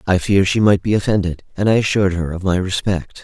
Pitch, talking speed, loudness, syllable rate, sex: 95 Hz, 240 wpm, -17 LUFS, 6.4 syllables/s, male